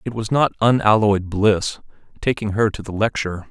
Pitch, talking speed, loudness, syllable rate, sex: 105 Hz, 170 wpm, -19 LUFS, 5.1 syllables/s, male